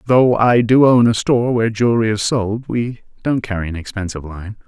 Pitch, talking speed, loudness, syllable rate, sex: 110 Hz, 205 wpm, -16 LUFS, 5.7 syllables/s, male